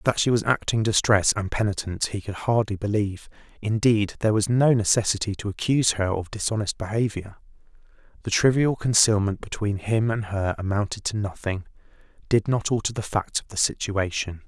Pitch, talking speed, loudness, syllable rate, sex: 105 Hz, 165 wpm, -24 LUFS, 5.6 syllables/s, male